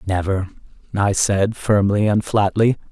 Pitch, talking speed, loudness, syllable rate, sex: 100 Hz, 125 wpm, -19 LUFS, 4.2 syllables/s, male